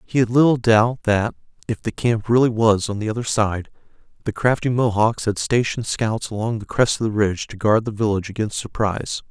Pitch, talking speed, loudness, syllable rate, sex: 110 Hz, 205 wpm, -20 LUFS, 5.6 syllables/s, male